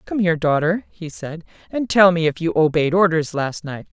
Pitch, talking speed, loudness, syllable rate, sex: 170 Hz, 210 wpm, -18 LUFS, 5.2 syllables/s, female